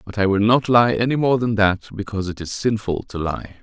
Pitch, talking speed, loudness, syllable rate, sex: 105 Hz, 250 wpm, -20 LUFS, 5.6 syllables/s, male